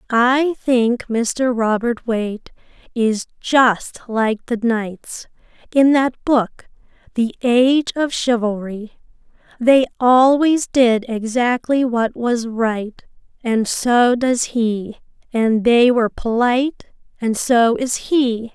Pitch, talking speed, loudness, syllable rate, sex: 240 Hz, 115 wpm, -17 LUFS, 3.2 syllables/s, female